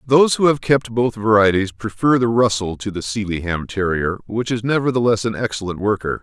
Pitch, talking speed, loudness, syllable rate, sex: 110 Hz, 185 wpm, -18 LUFS, 5.6 syllables/s, male